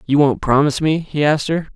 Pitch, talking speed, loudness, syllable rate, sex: 145 Hz, 240 wpm, -17 LUFS, 6.3 syllables/s, male